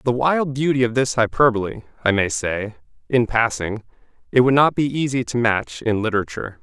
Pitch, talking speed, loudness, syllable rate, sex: 120 Hz, 180 wpm, -20 LUFS, 5.4 syllables/s, male